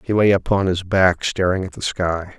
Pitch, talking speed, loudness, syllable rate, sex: 95 Hz, 225 wpm, -19 LUFS, 4.9 syllables/s, male